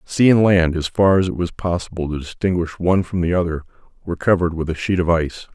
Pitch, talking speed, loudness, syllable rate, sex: 85 Hz, 240 wpm, -19 LUFS, 6.4 syllables/s, male